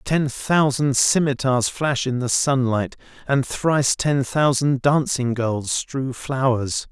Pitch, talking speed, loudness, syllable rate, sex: 130 Hz, 130 wpm, -20 LUFS, 3.5 syllables/s, male